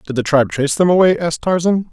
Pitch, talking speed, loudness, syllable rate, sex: 160 Hz, 250 wpm, -15 LUFS, 7.3 syllables/s, male